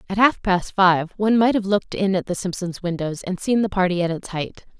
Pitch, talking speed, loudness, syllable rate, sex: 190 Hz, 250 wpm, -21 LUFS, 5.6 syllables/s, female